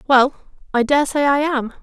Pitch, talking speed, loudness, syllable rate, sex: 275 Hz, 165 wpm, -18 LUFS, 5.7 syllables/s, female